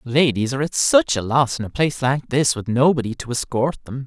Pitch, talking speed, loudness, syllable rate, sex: 130 Hz, 235 wpm, -19 LUFS, 5.6 syllables/s, male